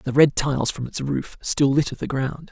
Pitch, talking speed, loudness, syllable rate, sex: 140 Hz, 240 wpm, -22 LUFS, 4.9 syllables/s, male